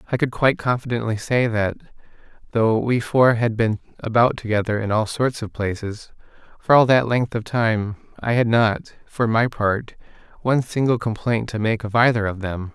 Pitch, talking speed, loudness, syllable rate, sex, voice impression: 115 Hz, 185 wpm, -20 LUFS, 5.1 syllables/s, male, very masculine, very adult-like, middle-aged, very thick, slightly tensed, slightly powerful, slightly bright, slightly soft, clear, fluent, cool, intellectual, refreshing, sincere, very calm, mature, friendly, reassuring, very unique, very elegant, slightly wild, very sweet, slightly lively, kind, slightly modest